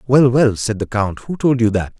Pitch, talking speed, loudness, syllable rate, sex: 115 Hz, 270 wpm, -16 LUFS, 5.2 syllables/s, male